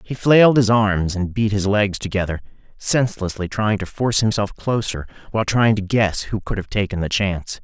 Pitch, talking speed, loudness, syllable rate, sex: 105 Hz, 195 wpm, -19 LUFS, 5.3 syllables/s, male